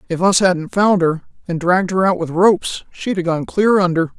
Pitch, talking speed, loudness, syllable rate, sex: 180 Hz, 230 wpm, -16 LUFS, 5.2 syllables/s, female